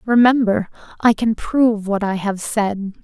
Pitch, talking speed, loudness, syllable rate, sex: 215 Hz, 160 wpm, -18 LUFS, 4.3 syllables/s, female